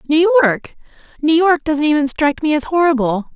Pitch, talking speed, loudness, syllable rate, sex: 290 Hz, 160 wpm, -15 LUFS, 5.4 syllables/s, female